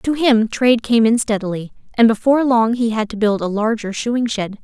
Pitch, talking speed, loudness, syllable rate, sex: 225 Hz, 220 wpm, -17 LUFS, 5.3 syllables/s, female